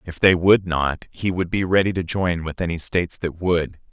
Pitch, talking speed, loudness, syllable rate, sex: 85 Hz, 230 wpm, -21 LUFS, 4.9 syllables/s, male